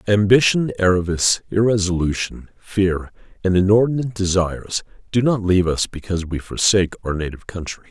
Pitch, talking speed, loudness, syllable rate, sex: 95 Hz, 130 wpm, -19 LUFS, 5.9 syllables/s, male